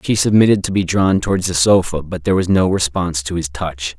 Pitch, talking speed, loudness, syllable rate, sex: 90 Hz, 240 wpm, -16 LUFS, 6.0 syllables/s, male